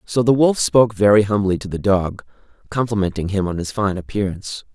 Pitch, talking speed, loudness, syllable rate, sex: 100 Hz, 190 wpm, -18 LUFS, 5.8 syllables/s, male